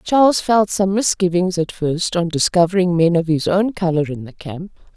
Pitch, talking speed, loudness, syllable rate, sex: 180 Hz, 195 wpm, -17 LUFS, 5.0 syllables/s, female